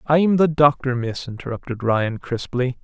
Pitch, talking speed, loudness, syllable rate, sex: 135 Hz, 150 wpm, -20 LUFS, 4.5 syllables/s, male